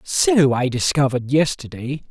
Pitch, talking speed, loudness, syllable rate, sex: 140 Hz, 115 wpm, -19 LUFS, 4.6 syllables/s, male